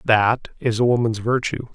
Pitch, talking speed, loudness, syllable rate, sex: 115 Hz, 170 wpm, -20 LUFS, 4.7 syllables/s, male